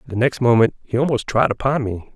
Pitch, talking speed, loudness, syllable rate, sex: 120 Hz, 225 wpm, -19 LUFS, 5.7 syllables/s, male